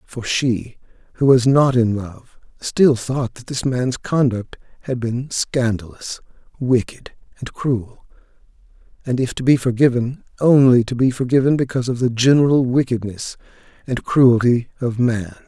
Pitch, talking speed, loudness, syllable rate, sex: 125 Hz, 145 wpm, -18 LUFS, 4.4 syllables/s, male